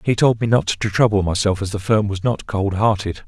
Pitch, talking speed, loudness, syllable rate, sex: 105 Hz, 255 wpm, -19 LUFS, 5.4 syllables/s, male